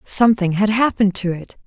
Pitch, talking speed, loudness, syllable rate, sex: 205 Hz, 180 wpm, -17 LUFS, 6.0 syllables/s, female